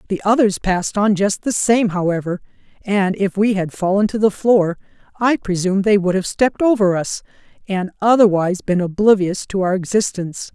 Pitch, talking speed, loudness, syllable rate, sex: 195 Hz, 175 wpm, -17 LUFS, 5.3 syllables/s, female